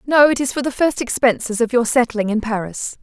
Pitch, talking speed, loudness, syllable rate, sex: 240 Hz, 240 wpm, -18 LUFS, 5.5 syllables/s, female